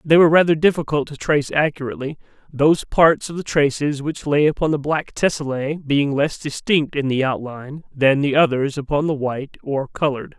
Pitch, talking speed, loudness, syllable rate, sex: 145 Hz, 185 wpm, -19 LUFS, 5.6 syllables/s, male